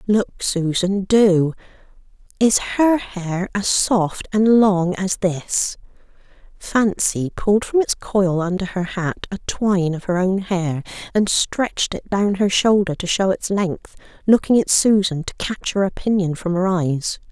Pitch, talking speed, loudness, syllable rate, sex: 190 Hz, 160 wpm, -19 LUFS, 3.9 syllables/s, female